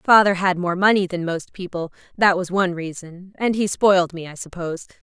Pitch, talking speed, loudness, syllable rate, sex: 180 Hz, 200 wpm, -20 LUFS, 5.5 syllables/s, female